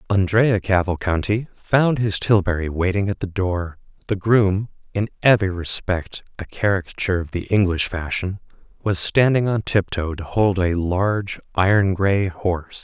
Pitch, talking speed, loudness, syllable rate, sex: 95 Hz, 145 wpm, -20 LUFS, 4.6 syllables/s, male